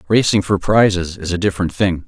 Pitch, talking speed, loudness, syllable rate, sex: 95 Hz, 200 wpm, -17 LUFS, 5.8 syllables/s, male